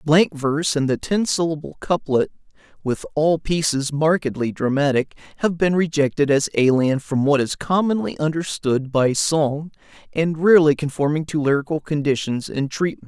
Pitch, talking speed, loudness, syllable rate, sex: 150 Hz, 145 wpm, -20 LUFS, 5.0 syllables/s, male